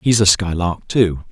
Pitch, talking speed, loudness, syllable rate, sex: 95 Hz, 185 wpm, -16 LUFS, 4.1 syllables/s, male